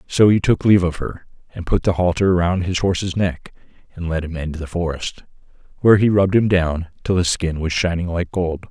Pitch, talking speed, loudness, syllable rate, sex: 90 Hz, 220 wpm, -19 LUFS, 5.6 syllables/s, male